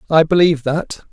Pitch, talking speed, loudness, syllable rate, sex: 155 Hz, 160 wpm, -15 LUFS, 6.0 syllables/s, male